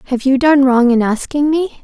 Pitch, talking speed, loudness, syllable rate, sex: 270 Hz, 230 wpm, -13 LUFS, 5.0 syllables/s, female